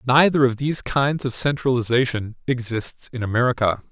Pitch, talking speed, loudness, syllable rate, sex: 125 Hz, 140 wpm, -21 LUFS, 5.3 syllables/s, male